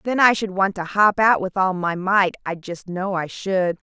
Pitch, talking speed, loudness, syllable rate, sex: 190 Hz, 245 wpm, -20 LUFS, 4.4 syllables/s, female